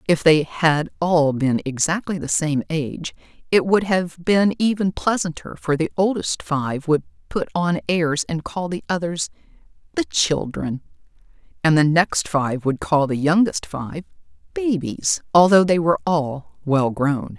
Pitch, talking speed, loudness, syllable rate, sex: 150 Hz, 155 wpm, -20 LUFS, 4.2 syllables/s, female